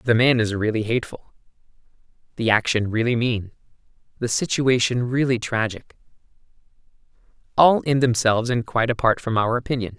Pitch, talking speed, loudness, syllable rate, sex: 120 Hz, 125 wpm, -21 LUFS, 5.6 syllables/s, male